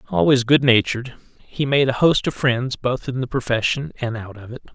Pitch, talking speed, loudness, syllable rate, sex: 125 Hz, 200 wpm, -19 LUFS, 5.4 syllables/s, male